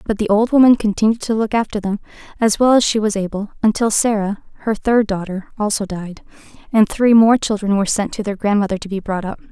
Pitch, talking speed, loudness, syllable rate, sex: 210 Hz, 220 wpm, -17 LUFS, 6.0 syllables/s, female